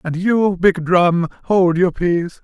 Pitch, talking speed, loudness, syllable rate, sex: 180 Hz, 170 wpm, -16 LUFS, 3.7 syllables/s, male